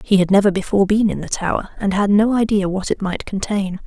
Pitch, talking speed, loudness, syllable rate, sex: 200 Hz, 250 wpm, -18 LUFS, 6.1 syllables/s, female